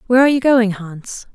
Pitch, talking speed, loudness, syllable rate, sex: 225 Hz, 225 wpm, -14 LUFS, 6.1 syllables/s, female